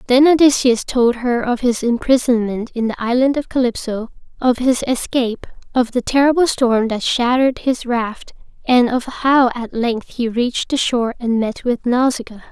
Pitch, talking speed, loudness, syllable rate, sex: 245 Hz, 175 wpm, -17 LUFS, 4.8 syllables/s, female